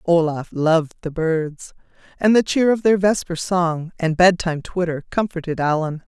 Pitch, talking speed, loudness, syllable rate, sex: 170 Hz, 155 wpm, -20 LUFS, 4.8 syllables/s, female